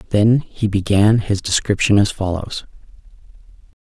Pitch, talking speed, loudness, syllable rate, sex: 105 Hz, 105 wpm, -17 LUFS, 4.5 syllables/s, male